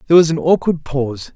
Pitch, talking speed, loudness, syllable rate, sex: 155 Hz, 220 wpm, -16 LUFS, 7.1 syllables/s, male